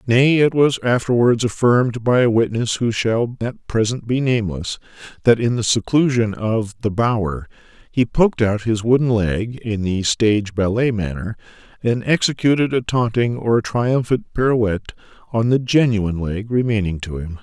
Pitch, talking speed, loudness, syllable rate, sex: 115 Hz, 160 wpm, -18 LUFS, 4.8 syllables/s, male